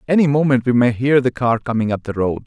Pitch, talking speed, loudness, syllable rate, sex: 125 Hz, 270 wpm, -17 LUFS, 6.2 syllables/s, male